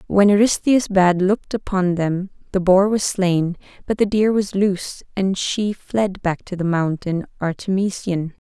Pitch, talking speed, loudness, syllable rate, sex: 190 Hz, 165 wpm, -19 LUFS, 4.3 syllables/s, female